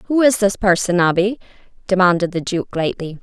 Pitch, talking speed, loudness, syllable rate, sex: 190 Hz, 165 wpm, -17 LUFS, 5.2 syllables/s, female